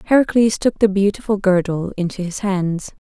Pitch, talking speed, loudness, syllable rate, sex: 195 Hz, 155 wpm, -18 LUFS, 5.1 syllables/s, female